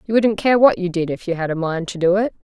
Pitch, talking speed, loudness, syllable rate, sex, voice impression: 190 Hz, 345 wpm, -18 LUFS, 6.2 syllables/s, female, feminine, slightly middle-aged, calm, elegant